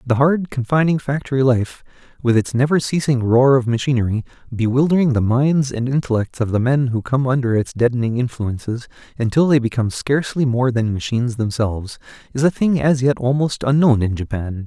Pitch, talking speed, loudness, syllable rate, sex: 125 Hz, 175 wpm, -18 LUFS, 5.6 syllables/s, male